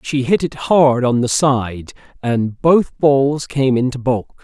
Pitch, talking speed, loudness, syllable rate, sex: 130 Hz, 175 wpm, -16 LUFS, 3.5 syllables/s, male